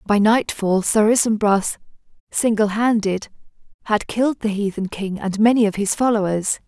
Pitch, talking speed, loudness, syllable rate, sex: 210 Hz, 145 wpm, -19 LUFS, 4.8 syllables/s, female